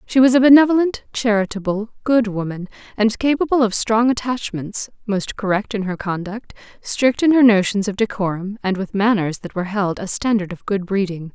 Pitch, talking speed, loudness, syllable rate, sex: 215 Hz, 180 wpm, -18 LUFS, 5.2 syllables/s, female